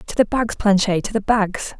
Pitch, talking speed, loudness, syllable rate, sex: 210 Hz, 235 wpm, -19 LUFS, 4.9 syllables/s, female